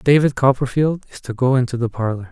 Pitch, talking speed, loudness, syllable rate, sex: 130 Hz, 210 wpm, -18 LUFS, 5.9 syllables/s, male